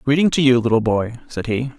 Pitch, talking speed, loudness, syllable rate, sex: 125 Hz, 235 wpm, -18 LUFS, 5.9 syllables/s, male